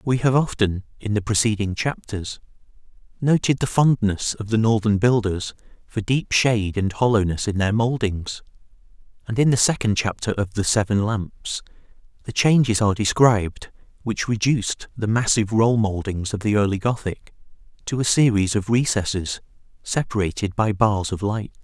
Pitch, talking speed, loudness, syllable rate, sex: 110 Hz, 155 wpm, -21 LUFS, 5.0 syllables/s, male